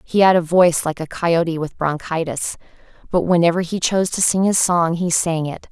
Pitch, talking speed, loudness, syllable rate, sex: 170 Hz, 210 wpm, -18 LUFS, 5.3 syllables/s, female